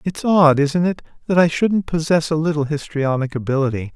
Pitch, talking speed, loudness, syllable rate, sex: 155 Hz, 180 wpm, -18 LUFS, 5.3 syllables/s, male